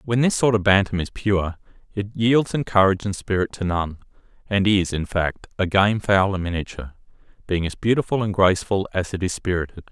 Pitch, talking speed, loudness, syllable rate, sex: 95 Hz, 200 wpm, -21 LUFS, 5.6 syllables/s, male